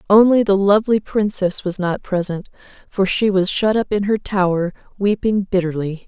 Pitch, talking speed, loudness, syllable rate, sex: 195 Hz, 170 wpm, -18 LUFS, 5.0 syllables/s, female